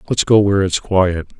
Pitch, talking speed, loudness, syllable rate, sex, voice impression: 95 Hz, 215 wpm, -15 LUFS, 5.4 syllables/s, male, very masculine, slightly old, slightly thick, muffled, cool, sincere, calm, reassuring, slightly elegant